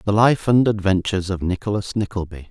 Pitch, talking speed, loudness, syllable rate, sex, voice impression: 100 Hz, 165 wpm, -20 LUFS, 5.9 syllables/s, male, masculine, middle-aged, tensed, powerful, slightly hard, clear, fluent, cool, intellectual, sincere, calm, reassuring, wild, lively, kind